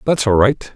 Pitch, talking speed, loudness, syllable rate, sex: 120 Hz, 240 wpm, -15 LUFS, 4.9 syllables/s, male